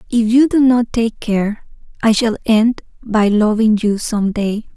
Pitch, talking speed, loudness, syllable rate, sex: 220 Hz, 175 wpm, -15 LUFS, 3.9 syllables/s, female